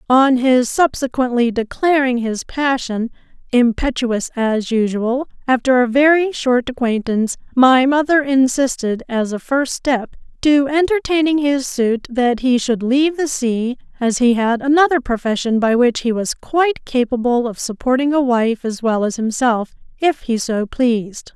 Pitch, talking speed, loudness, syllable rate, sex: 255 Hz, 150 wpm, -17 LUFS, 4.4 syllables/s, female